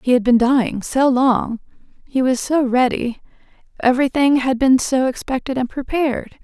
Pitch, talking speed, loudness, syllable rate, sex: 255 Hz, 160 wpm, -18 LUFS, 5.0 syllables/s, female